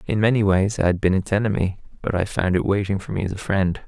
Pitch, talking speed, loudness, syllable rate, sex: 100 Hz, 280 wpm, -21 LUFS, 6.3 syllables/s, male